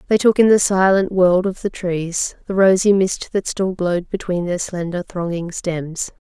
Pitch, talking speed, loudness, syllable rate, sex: 185 Hz, 190 wpm, -18 LUFS, 4.5 syllables/s, female